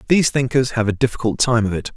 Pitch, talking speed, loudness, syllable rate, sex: 120 Hz, 245 wpm, -18 LUFS, 6.9 syllables/s, male